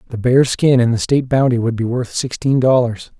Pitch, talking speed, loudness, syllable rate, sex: 125 Hz, 225 wpm, -16 LUFS, 5.5 syllables/s, male